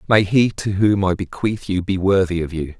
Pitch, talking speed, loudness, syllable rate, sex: 95 Hz, 235 wpm, -19 LUFS, 5.0 syllables/s, male